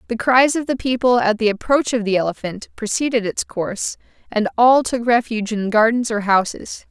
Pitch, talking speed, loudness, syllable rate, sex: 230 Hz, 190 wpm, -18 LUFS, 5.3 syllables/s, female